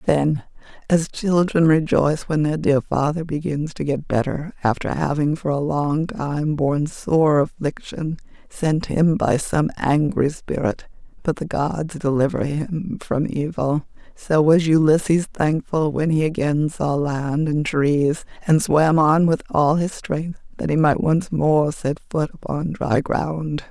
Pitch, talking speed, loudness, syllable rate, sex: 150 Hz, 155 wpm, -20 LUFS, 3.9 syllables/s, female